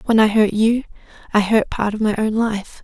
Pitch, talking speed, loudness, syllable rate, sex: 215 Hz, 235 wpm, -18 LUFS, 5.0 syllables/s, female